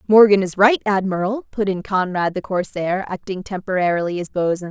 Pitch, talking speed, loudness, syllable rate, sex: 190 Hz, 165 wpm, -19 LUFS, 5.4 syllables/s, female